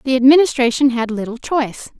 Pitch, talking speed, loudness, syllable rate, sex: 255 Hz, 150 wpm, -16 LUFS, 6.1 syllables/s, female